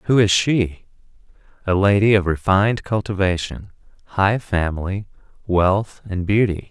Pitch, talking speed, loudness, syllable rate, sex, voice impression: 95 Hz, 115 wpm, -19 LUFS, 4.6 syllables/s, male, masculine, adult-like, tensed, powerful, slightly dark, clear, cool, slightly intellectual, calm, reassuring, wild, slightly kind, slightly modest